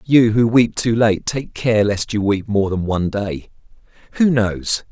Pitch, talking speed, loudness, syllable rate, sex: 105 Hz, 195 wpm, -17 LUFS, 4.2 syllables/s, male